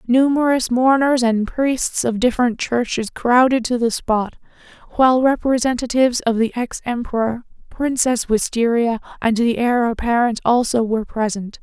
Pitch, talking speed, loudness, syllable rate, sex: 240 Hz, 135 wpm, -18 LUFS, 4.8 syllables/s, female